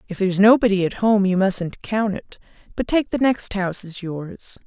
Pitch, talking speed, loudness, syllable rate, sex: 200 Hz, 205 wpm, -20 LUFS, 4.9 syllables/s, female